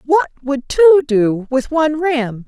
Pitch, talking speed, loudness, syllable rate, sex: 285 Hz, 170 wpm, -15 LUFS, 4.1 syllables/s, female